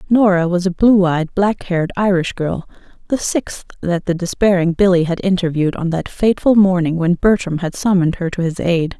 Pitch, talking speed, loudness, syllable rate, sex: 180 Hz, 195 wpm, -16 LUFS, 5.4 syllables/s, female